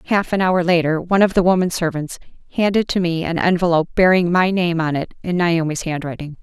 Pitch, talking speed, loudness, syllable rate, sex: 170 Hz, 205 wpm, -18 LUFS, 6.0 syllables/s, female